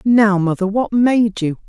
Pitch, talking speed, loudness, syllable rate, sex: 210 Hz, 180 wpm, -16 LUFS, 4.0 syllables/s, female